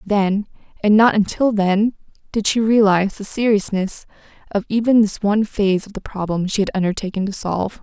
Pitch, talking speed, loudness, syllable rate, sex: 205 Hz, 175 wpm, -18 LUFS, 5.5 syllables/s, female